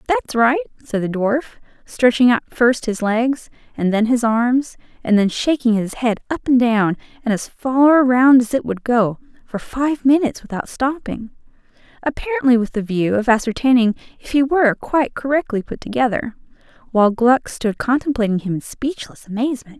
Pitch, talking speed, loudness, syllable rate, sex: 240 Hz, 170 wpm, -18 LUFS, 5.1 syllables/s, female